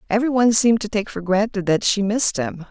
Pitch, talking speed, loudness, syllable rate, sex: 205 Hz, 245 wpm, -19 LUFS, 6.8 syllables/s, female